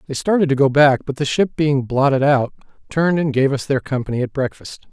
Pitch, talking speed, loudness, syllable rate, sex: 140 Hz, 230 wpm, -18 LUFS, 6.0 syllables/s, male